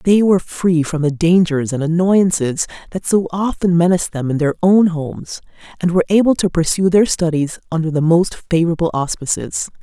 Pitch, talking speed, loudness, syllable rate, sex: 170 Hz, 175 wpm, -16 LUFS, 5.4 syllables/s, female